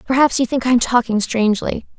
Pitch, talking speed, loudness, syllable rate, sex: 240 Hz, 210 wpm, -17 LUFS, 6.4 syllables/s, female